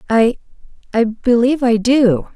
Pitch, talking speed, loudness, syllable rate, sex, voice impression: 235 Hz, 100 wpm, -15 LUFS, 4.4 syllables/s, female, feminine, adult-like, tensed, powerful, bright, slightly soft, slightly intellectual, slightly friendly, elegant, lively